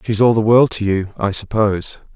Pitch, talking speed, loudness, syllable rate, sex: 105 Hz, 225 wpm, -16 LUFS, 5.5 syllables/s, male